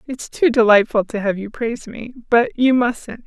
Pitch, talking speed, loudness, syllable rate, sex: 230 Hz, 185 wpm, -17 LUFS, 4.6 syllables/s, female